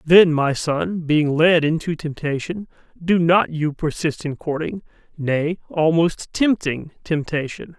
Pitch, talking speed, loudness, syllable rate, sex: 160 Hz, 130 wpm, -20 LUFS, 3.8 syllables/s, male